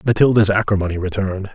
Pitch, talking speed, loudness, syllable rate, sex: 100 Hz, 115 wpm, -17 LUFS, 7.1 syllables/s, male